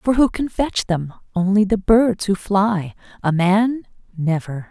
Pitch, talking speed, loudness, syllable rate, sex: 200 Hz, 165 wpm, -19 LUFS, 3.9 syllables/s, female